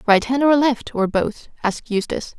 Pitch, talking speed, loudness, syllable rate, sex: 235 Hz, 200 wpm, -20 LUFS, 5.2 syllables/s, female